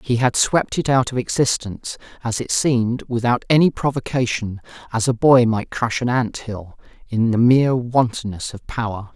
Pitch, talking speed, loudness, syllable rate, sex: 120 Hz, 175 wpm, -19 LUFS, 4.9 syllables/s, male